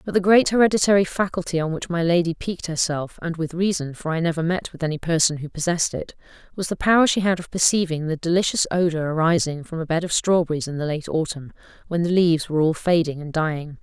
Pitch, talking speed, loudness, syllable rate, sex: 170 Hz, 225 wpm, -21 LUFS, 6.4 syllables/s, female